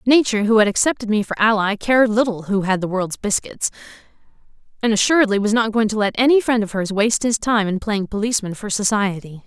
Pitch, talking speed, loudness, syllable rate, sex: 215 Hz, 210 wpm, -18 LUFS, 6.2 syllables/s, female